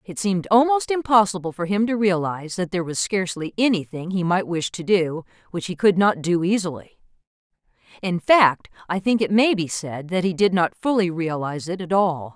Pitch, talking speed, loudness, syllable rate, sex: 185 Hz, 200 wpm, -21 LUFS, 5.4 syllables/s, female